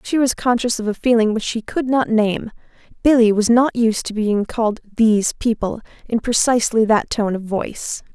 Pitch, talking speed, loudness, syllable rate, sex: 225 Hz, 190 wpm, -18 LUFS, 5.1 syllables/s, female